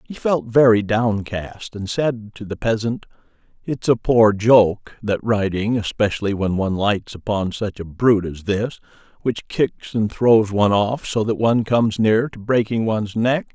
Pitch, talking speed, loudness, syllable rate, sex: 110 Hz, 175 wpm, -19 LUFS, 4.5 syllables/s, male